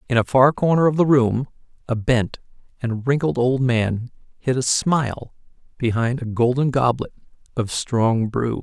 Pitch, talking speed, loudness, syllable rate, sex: 125 Hz, 160 wpm, -20 LUFS, 4.5 syllables/s, male